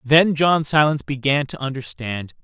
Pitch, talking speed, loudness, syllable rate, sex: 135 Hz, 150 wpm, -19 LUFS, 4.8 syllables/s, male